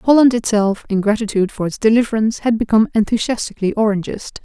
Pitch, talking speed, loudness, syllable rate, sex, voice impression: 220 Hz, 150 wpm, -17 LUFS, 6.8 syllables/s, female, gender-neutral, slightly young, slightly clear, fluent, refreshing, calm, friendly, kind